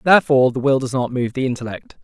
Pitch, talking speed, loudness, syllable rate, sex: 130 Hz, 235 wpm, -18 LUFS, 6.8 syllables/s, male